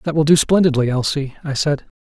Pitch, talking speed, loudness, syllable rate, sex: 145 Hz, 205 wpm, -17 LUFS, 5.9 syllables/s, male